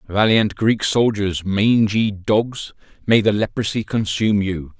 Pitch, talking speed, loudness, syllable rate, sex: 105 Hz, 125 wpm, -18 LUFS, 4.0 syllables/s, male